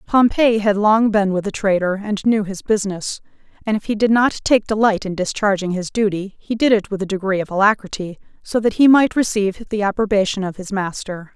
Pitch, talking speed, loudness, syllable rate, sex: 205 Hz, 210 wpm, -18 LUFS, 5.6 syllables/s, female